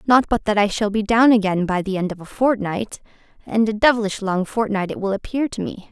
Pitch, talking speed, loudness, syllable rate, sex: 210 Hz, 245 wpm, -20 LUFS, 5.7 syllables/s, female